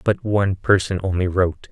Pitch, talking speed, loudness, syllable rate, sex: 95 Hz, 175 wpm, -20 LUFS, 5.6 syllables/s, male